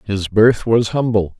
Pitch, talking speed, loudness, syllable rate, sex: 110 Hz, 170 wpm, -16 LUFS, 3.9 syllables/s, male